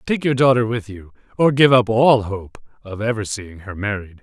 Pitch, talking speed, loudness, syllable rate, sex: 115 Hz, 215 wpm, -18 LUFS, 4.9 syllables/s, male